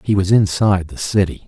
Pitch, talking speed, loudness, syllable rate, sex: 95 Hz, 205 wpm, -16 LUFS, 5.8 syllables/s, male